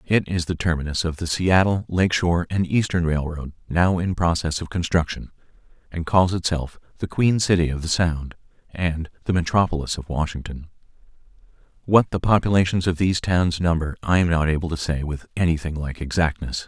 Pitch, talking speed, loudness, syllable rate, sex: 85 Hz, 175 wpm, -22 LUFS, 5.4 syllables/s, male